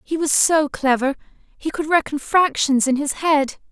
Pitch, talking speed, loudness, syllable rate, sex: 290 Hz, 180 wpm, -19 LUFS, 4.3 syllables/s, female